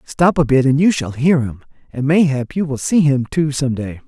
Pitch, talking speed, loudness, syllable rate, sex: 140 Hz, 250 wpm, -16 LUFS, 5.0 syllables/s, male